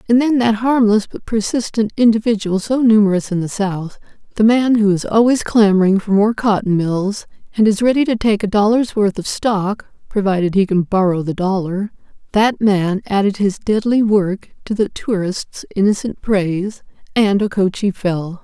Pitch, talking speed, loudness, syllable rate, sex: 205 Hz, 165 wpm, -16 LUFS, 4.8 syllables/s, female